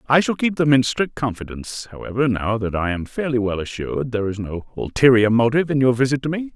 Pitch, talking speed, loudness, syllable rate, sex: 125 Hz, 230 wpm, -20 LUFS, 6.1 syllables/s, male